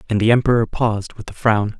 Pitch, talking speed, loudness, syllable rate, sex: 110 Hz, 235 wpm, -18 LUFS, 6.2 syllables/s, male